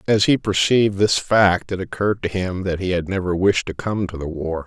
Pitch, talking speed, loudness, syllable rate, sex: 95 Hz, 245 wpm, -20 LUFS, 5.3 syllables/s, male